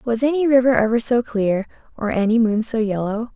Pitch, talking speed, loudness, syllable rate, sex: 230 Hz, 195 wpm, -19 LUFS, 5.5 syllables/s, female